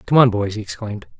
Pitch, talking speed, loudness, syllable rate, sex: 110 Hz, 250 wpm, -19 LUFS, 7.0 syllables/s, male